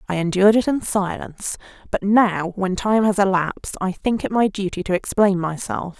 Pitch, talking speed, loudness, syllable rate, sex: 195 Hz, 190 wpm, -20 LUFS, 5.2 syllables/s, female